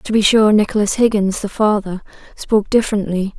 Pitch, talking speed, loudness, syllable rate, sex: 205 Hz, 160 wpm, -16 LUFS, 5.6 syllables/s, female